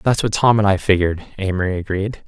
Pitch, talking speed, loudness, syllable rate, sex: 100 Hz, 210 wpm, -18 LUFS, 6.3 syllables/s, male